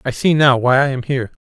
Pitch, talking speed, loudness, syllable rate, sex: 135 Hz, 295 wpm, -15 LUFS, 6.5 syllables/s, male